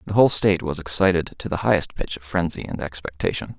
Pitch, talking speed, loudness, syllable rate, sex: 85 Hz, 215 wpm, -22 LUFS, 6.5 syllables/s, male